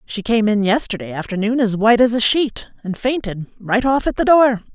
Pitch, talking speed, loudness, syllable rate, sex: 225 Hz, 215 wpm, -17 LUFS, 5.4 syllables/s, female